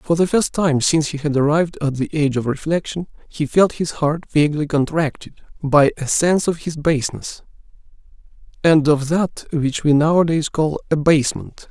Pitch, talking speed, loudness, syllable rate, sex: 155 Hz, 170 wpm, -18 LUFS, 5.2 syllables/s, male